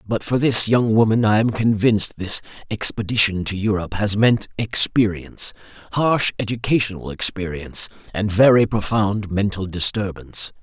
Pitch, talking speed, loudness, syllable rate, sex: 105 Hz, 130 wpm, -19 LUFS, 5.0 syllables/s, male